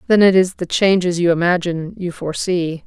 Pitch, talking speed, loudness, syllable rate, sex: 180 Hz, 190 wpm, -17 LUFS, 5.6 syllables/s, female